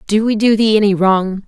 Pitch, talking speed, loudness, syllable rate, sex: 205 Hz, 245 wpm, -13 LUFS, 5.3 syllables/s, female